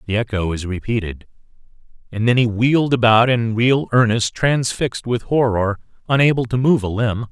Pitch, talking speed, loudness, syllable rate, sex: 115 Hz, 165 wpm, -18 LUFS, 5.2 syllables/s, male